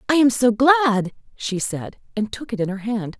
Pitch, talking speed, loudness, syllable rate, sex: 230 Hz, 225 wpm, -20 LUFS, 4.6 syllables/s, female